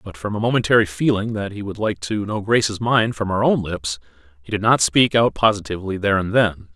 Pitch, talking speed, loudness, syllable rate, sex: 105 Hz, 230 wpm, -19 LUFS, 5.8 syllables/s, male